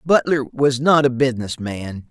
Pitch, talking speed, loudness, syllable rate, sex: 130 Hz, 170 wpm, -19 LUFS, 4.5 syllables/s, male